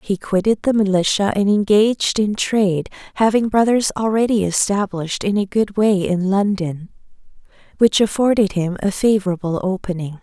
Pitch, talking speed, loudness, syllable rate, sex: 200 Hz, 140 wpm, -18 LUFS, 5.1 syllables/s, female